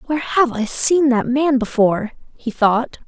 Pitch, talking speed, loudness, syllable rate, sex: 250 Hz, 175 wpm, -17 LUFS, 4.6 syllables/s, female